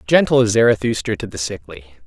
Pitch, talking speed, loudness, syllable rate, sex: 105 Hz, 175 wpm, -17 LUFS, 5.8 syllables/s, male